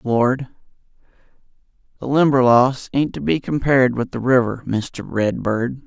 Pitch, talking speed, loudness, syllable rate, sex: 125 Hz, 125 wpm, -18 LUFS, 4.3 syllables/s, male